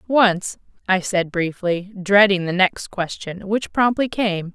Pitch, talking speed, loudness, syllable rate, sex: 195 Hz, 145 wpm, -20 LUFS, 3.7 syllables/s, female